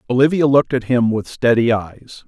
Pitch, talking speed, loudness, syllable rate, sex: 120 Hz, 185 wpm, -16 LUFS, 5.3 syllables/s, male